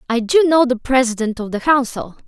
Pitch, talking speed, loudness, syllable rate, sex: 250 Hz, 210 wpm, -16 LUFS, 5.5 syllables/s, female